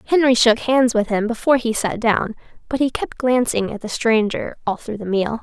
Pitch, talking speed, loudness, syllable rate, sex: 230 Hz, 220 wpm, -19 LUFS, 5.1 syllables/s, female